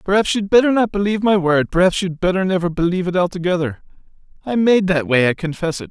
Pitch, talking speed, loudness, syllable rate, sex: 180 Hz, 205 wpm, -17 LUFS, 6.5 syllables/s, male